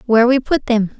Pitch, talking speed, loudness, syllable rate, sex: 240 Hz, 240 wpm, -15 LUFS, 5.9 syllables/s, female